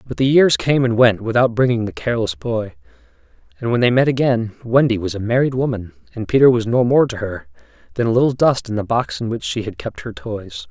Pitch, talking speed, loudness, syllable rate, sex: 115 Hz, 235 wpm, -18 LUFS, 5.8 syllables/s, male